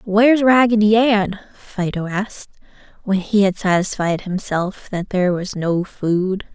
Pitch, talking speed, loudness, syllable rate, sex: 195 Hz, 135 wpm, -18 LUFS, 4.2 syllables/s, female